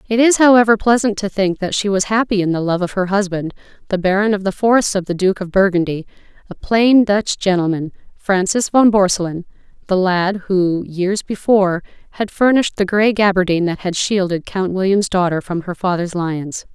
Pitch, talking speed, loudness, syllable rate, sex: 195 Hz, 190 wpm, -16 LUFS, 5.3 syllables/s, female